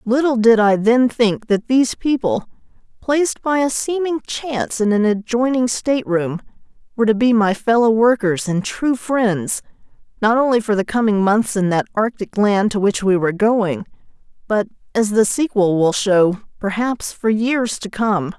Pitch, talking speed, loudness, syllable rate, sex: 220 Hz, 170 wpm, -17 LUFS, 4.6 syllables/s, female